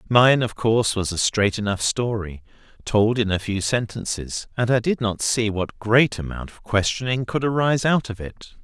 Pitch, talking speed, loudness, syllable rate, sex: 110 Hz, 195 wpm, -21 LUFS, 4.8 syllables/s, male